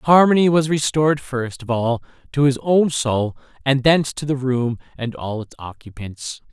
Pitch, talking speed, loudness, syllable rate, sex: 130 Hz, 175 wpm, -19 LUFS, 4.6 syllables/s, male